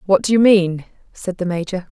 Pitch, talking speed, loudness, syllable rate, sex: 185 Hz, 215 wpm, -17 LUFS, 5.3 syllables/s, female